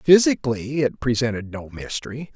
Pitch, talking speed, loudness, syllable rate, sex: 125 Hz, 125 wpm, -22 LUFS, 5.2 syllables/s, male